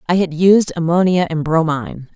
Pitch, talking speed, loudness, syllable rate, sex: 170 Hz, 165 wpm, -15 LUFS, 5.2 syllables/s, female